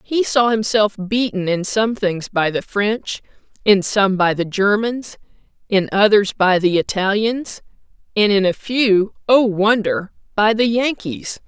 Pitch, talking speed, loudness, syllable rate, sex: 210 Hz, 150 wpm, -17 LUFS, 3.9 syllables/s, female